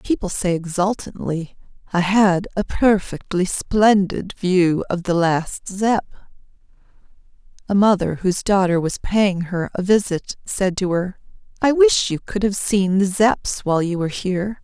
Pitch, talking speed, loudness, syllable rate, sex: 190 Hz, 150 wpm, -19 LUFS, 4.3 syllables/s, female